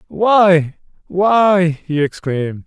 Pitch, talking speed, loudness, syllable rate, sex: 175 Hz, 70 wpm, -15 LUFS, 2.9 syllables/s, male